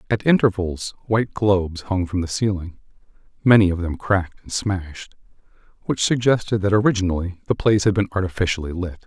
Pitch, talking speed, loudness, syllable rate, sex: 100 Hz, 145 wpm, -21 LUFS, 6.0 syllables/s, male